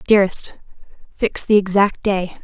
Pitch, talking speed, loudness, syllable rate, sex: 195 Hz, 125 wpm, -17 LUFS, 4.8 syllables/s, female